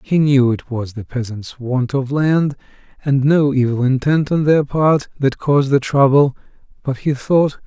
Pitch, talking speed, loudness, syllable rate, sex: 135 Hz, 180 wpm, -17 LUFS, 4.4 syllables/s, male